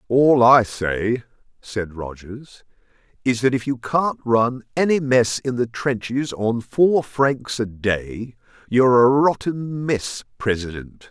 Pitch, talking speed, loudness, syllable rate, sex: 120 Hz, 140 wpm, -20 LUFS, 3.5 syllables/s, male